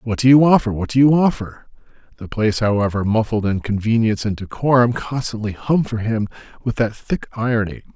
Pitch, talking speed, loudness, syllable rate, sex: 115 Hz, 175 wpm, -18 LUFS, 5.8 syllables/s, male